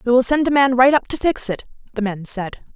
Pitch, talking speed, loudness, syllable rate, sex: 245 Hz, 285 wpm, -18 LUFS, 5.8 syllables/s, female